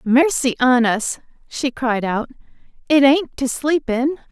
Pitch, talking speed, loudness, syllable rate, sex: 260 Hz, 155 wpm, -18 LUFS, 3.8 syllables/s, female